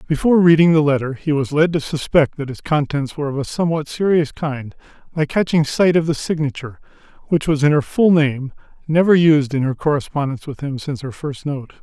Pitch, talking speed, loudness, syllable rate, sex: 150 Hz, 205 wpm, -18 LUFS, 5.9 syllables/s, male